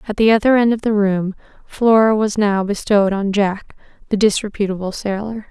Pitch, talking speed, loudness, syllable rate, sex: 205 Hz, 175 wpm, -17 LUFS, 5.3 syllables/s, female